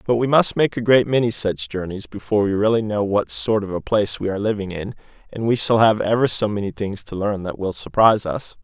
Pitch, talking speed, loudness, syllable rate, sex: 105 Hz, 250 wpm, -20 LUFS, 5.9 syllables/s, male